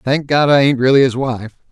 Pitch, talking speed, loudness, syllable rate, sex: 130 Hz, 245 wpm, -14 LUFS, 5.3 syllables/s, male